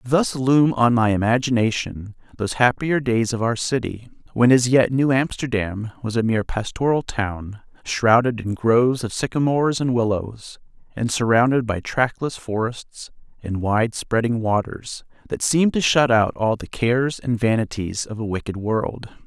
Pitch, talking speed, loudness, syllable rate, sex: 120 Hz, 160 wpm, -20 LUFS, 4.6 syllables/s, male